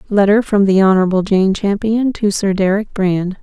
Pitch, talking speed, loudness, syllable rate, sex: 200 Hz, 175 wpm, -14 LUFS, 5.0 syllables/s, female